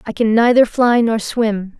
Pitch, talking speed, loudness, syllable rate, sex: 225 Hz, 200 wpm, -15 LUFS, 4.2 syllables/s, female